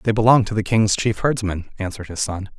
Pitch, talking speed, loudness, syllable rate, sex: 105 Hz, 230 wpm, -20 LUFS, 6.0 syllables/s, male